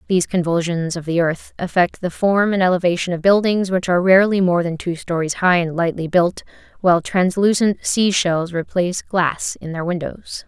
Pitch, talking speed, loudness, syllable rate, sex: 180 Hz, 185 wpm, -18 LUFS, 5.2 syllables/s, female